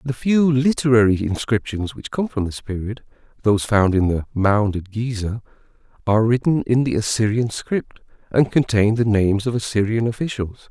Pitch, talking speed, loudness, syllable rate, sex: 115 Hz, 165 wpm, -20 LUFS, 5.2 syllables/s, male